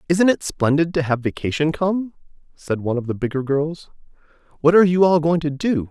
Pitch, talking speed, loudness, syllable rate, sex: 155 Hz, 205 wpm, -19 LUFS, 5.6 syllables/s, male